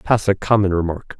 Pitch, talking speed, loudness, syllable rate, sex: 100 Hz, 200 wpm, -18 LUFS, 5.3 syllables/s, male